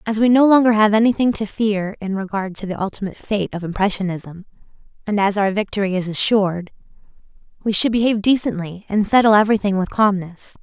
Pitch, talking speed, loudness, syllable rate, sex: 205 Hz, 175 wpm, -18 LUFS, 6.1 syllables/s, female